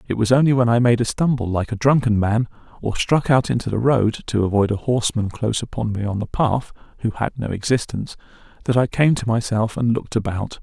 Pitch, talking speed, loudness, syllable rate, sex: 115 Hz, 215 wpm, -20 LUFS, 6.0 syllables/s, male